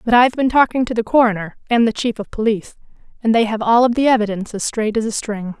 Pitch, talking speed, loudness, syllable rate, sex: 225 Hz, 255 wpm, -17 LUFS, 6.7 syllables/s, female